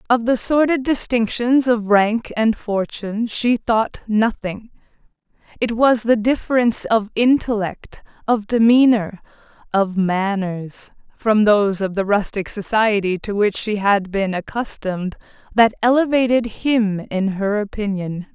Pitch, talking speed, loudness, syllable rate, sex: 215 Hz, 130 wpm, -18 LUFS, 4.2 syllables/s, female